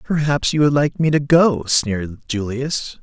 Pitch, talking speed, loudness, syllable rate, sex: 135 Hz, 180 wpm, -18 LUFS, 4.3 syllables/s, male